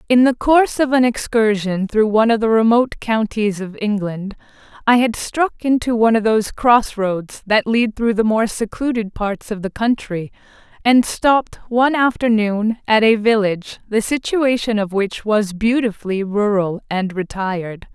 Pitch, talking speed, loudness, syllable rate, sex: 220 Hz, 165 wpm, -17 LUFS, 4.7 syllables/s, female